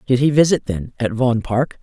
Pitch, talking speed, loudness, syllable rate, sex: 125 Hz, 230 wpm, -18 LUFS, 5.5 syllables/s, female